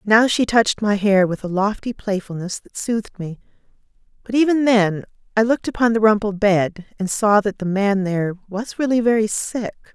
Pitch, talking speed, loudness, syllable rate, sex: 210 Hz, 185 wpm, -19 LUFS, 5.2 syllables/s, female